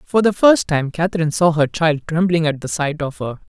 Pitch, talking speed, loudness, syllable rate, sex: 165 Hz, 235 wpm, -17 LUFS, 5.5 syllables/s, male